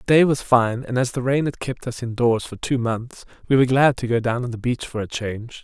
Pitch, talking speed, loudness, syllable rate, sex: 120 Hz, 300 wpm, -21 LUFS, 5.6 syllables/s, male